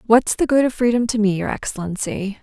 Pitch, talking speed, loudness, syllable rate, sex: 225 Hz, 225 wpm, -19 LUFS, 5.8 syllables/s, female